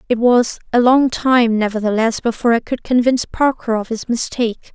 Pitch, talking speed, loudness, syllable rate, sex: 235 Hz, 175 wpm, -16 LUFS, 5.4 syllables/s, female